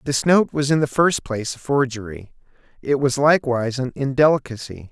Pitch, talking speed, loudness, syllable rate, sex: 135 Hz, 170 wpm, -19 LUFS, 5.6 syllables/s, male